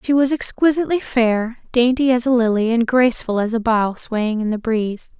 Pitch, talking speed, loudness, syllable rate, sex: 240 Hz, 195 wpm, -18 LUFS, 5.1 syllables/s, female